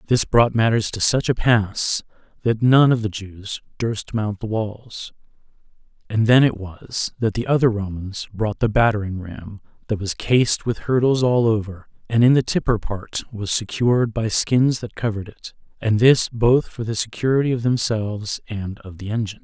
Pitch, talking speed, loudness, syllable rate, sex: 110 Hz, 180 wpm, -20 LUFS, 4.7 syllables/s, male